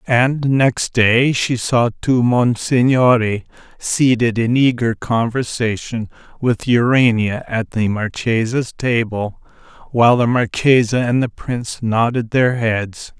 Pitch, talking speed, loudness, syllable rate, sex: 120 Hz, 120 wpm, -16 LUFS, 3.8 syllables/s, male